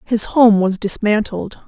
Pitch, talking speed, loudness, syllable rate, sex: 210 Hz, 145 wpm, -15 LUFS, 4.0 syllables/s, female